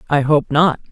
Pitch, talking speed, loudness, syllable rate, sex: 150 Hz, 195 wpm, -15 LUFS, 5.1 syllables/s, female